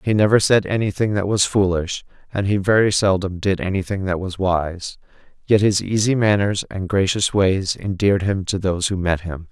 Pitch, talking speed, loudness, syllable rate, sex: 95 Hz, 190 wpm, -19 LUFS, 5.1 syllables/s, male